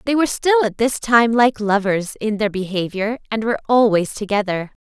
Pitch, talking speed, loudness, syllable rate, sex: 220 Hz, 185 wpm, -18 LUFS, 5.2 syllables/s, female